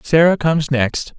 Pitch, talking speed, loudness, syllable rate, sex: 150 Hz, 150 wpm, -16 LUFS, 4.7 syllables/s, male